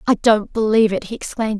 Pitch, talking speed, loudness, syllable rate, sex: 215 Hz, 225 wpm, -18 LUFS, 6.7 syllables/s, female